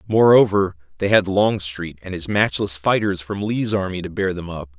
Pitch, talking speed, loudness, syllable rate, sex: 95 Hz, 190 wpm, -19 LUFS, 4.9 syllables/s, male